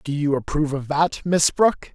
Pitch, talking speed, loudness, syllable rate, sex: 155 Hz, 215 wpm, -21 LUFS, 5.4 syllables/s, male